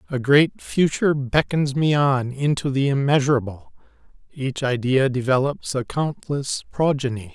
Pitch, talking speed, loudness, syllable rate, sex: 135 Hz, 120 wpm, -21 LUFS, 4.5 syllables/s, male